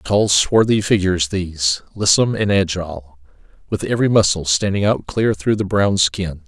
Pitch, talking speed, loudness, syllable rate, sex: 95 Hz, 160 wpm, -17 LUFS, 5.0 syllables/s, male